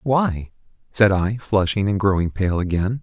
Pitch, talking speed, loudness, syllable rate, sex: 100 Hz, 160 wpm, -20 LUFS, 4.2 syllables/s, male